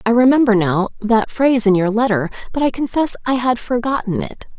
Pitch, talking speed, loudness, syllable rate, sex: 230 Hz, 195 wpm, -16 LUFS, 5.6 syllables/s, female